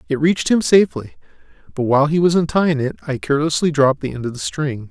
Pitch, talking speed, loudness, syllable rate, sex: 145 Hz, 220 wpm, -17 LUFS, 6.7 syllables/s, male